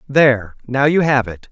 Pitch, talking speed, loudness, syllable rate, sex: 130 Hz, 195 wpm, -16 LUFS, 4.8 syllables/s, male